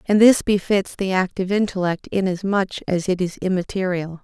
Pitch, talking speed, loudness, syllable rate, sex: 190 Hz, 155 wpm, -20 LUFS, 5.4 syllables/s, female